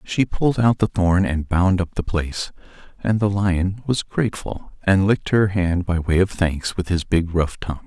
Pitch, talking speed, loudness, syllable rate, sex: 95 Hz, 215 wpm, -20 LUFS, 4.8 syllables/s, male